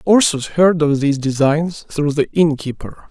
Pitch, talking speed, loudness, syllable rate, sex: 155 Hz, 175 wpm, -16 LUFS, 4.6 syllables/s, male